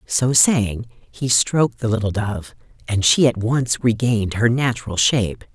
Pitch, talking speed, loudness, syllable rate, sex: 115 Hz, 160 wpm, -18 LUFS, 4.4 syllables/s, female